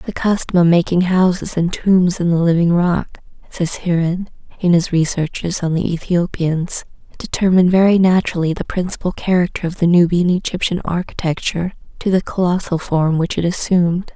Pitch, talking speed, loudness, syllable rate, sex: 175 Hz, 155 wpm, -17 LUFS, 5.3 syllables/s, female